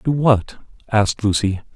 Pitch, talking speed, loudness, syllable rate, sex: 110 Hz, 135 wpm, -18 LUFS, 4.7 syllables/s, male